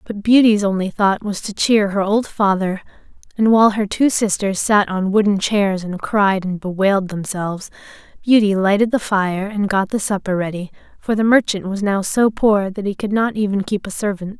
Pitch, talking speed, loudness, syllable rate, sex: 200 Hz, 200 wpm, -17 LUFS, 5.0 syllables/s, female